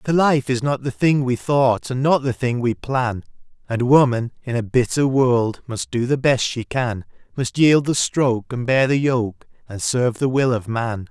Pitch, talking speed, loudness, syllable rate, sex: 125 Hz, 215 wpm, -19 LUFS, 4.4 syllables/s, male